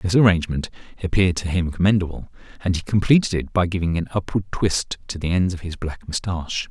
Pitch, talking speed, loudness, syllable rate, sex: 90 Hz, 195 wpm, -22 LUFS, 6.2 syllables/s, male